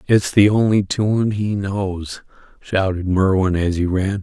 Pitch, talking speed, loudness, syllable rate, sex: 100 Hz, 155 wpm, -18 LUFS, 3.7 syllables/s, male